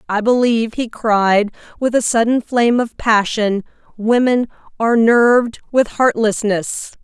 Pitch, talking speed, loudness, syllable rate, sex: 230 Hz, 130 wpm, -16 LUFS, 4.4 syllables/s, female